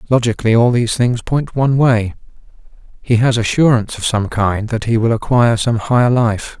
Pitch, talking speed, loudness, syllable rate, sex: 115 Hz, 180 wpm, -15 LUFS, 5.6 syllables/s, male